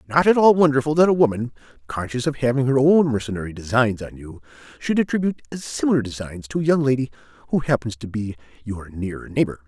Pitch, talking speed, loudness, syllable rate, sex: 130 Hz, 200 wpm, -21 LUFS, 6.2 syllables/s, male